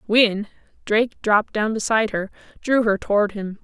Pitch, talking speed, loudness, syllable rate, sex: 215 Hz, 165 wpm, -20 LUFS, 5.3 syllables/s, female